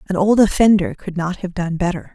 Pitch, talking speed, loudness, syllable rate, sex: 185 Hz, 225 wpm, -17 LUFS, 5.4 syllables/s, female